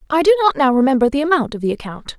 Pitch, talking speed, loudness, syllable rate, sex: 285 Hz, 275 wpm, -16 LUFS, 7.3 syllables/s, female